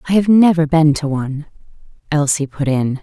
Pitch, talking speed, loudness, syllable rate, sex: 155 Hz, 180 wpm, -15 LUFS, 5.4 syllables/s, female